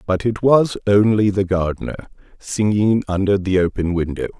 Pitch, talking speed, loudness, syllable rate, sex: 100 Hz, 150 wpm, -18 LUFS, 5.1 syllables/s, male